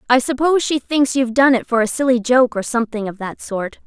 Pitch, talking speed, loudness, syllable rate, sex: 245 Hz, 250 wpm, -17 LUFS, 6.1 syllables/s, female